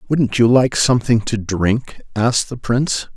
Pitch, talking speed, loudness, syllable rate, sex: 120 Hz, 170 wpm, -17 LUFS, 4.6 syllables/s, male